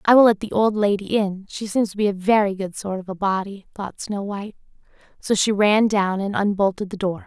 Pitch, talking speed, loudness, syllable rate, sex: 200 Hz, 240 wpm, -21 LUFS, 5.5 syllables/s, female